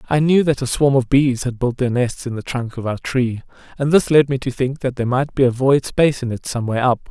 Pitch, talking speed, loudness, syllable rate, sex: 130 Hz, 295 wpm, -18 LUFS, 5.6 syllables/s, male